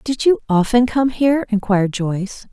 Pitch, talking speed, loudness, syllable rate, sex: 230 Hz, 165 wpm, -17 LUFS, 5.2 syllables/s, female